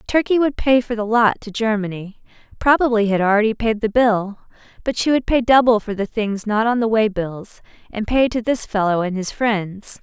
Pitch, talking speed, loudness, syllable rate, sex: 220 Hz, 210 wpm, -18 LUFS, 5.0 syllables/s, female